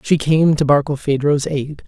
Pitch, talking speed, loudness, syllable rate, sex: 145 Hz, 160 wpm, -16 LUFS, 4.6 syllables/s, male